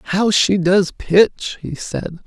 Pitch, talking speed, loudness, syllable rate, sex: 185 Hz, 160 wpm, -17 LUFS, 3.1 syllables/s, female